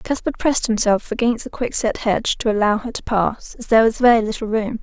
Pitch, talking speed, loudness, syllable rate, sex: 225 Hz, 225 wpm, -19 LUFS, 5.9 syllables/s, female